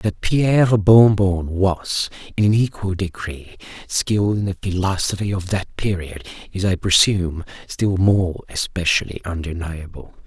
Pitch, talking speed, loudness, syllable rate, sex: 95 Hz, 135 wpm, -19 LUFS, 4.4 syllables/s, male